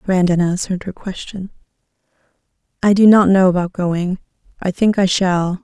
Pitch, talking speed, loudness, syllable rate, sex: 185 Hz, 150 wpm, -16 LUFS, 5.0 syllables/s, female